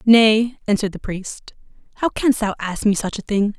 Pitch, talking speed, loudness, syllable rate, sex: 215 Hz, 200 wpm, -19 LUFS, 4.9 syllables/s, female